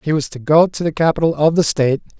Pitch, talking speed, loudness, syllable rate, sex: 155 Hz, 275 wpm, -16 LUFS, 6.7 syllables/s, male